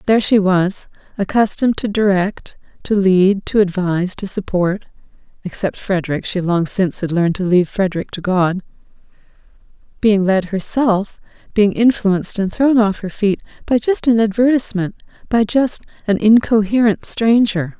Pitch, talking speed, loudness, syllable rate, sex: 200 Hz, 140 wpm, -16 LUFS, 5.0 syllables/s, female